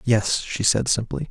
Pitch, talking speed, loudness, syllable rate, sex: 120 Hz, 185 wpm, -21 LUFS, 4.1 syllables/s, male